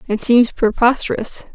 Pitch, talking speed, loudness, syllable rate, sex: 235 Hz, 115 wpm, -16 LUFS, 4.5 syllables/s, female